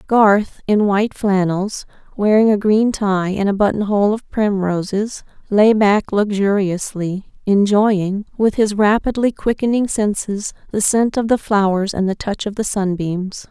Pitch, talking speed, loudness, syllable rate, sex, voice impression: 205 Hz, 155 wpm, -17 LUFS, 4.2 syllables/s, female, feminine, adult-like, slightly powerful, clear, fluent, intellectual, calm, elegant, slightly kind